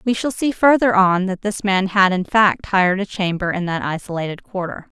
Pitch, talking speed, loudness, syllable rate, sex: 195 Hz, 215 wpm, -18 LUFS, 5.2 syllables/s, female